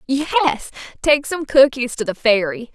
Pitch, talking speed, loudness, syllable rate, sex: 260 Hz, 155 wpm, -17 LUFS, 4.0 syllables/s, female